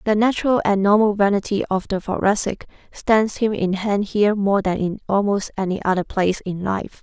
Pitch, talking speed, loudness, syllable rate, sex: 200 Hz, 190 wpm, -20 LUFS, 5.2 syllables/s, female